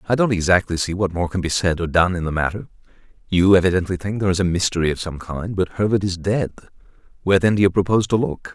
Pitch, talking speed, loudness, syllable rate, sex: 95 Hz, 245 wpm, -20 LUFS, 6.8 syllables/s, male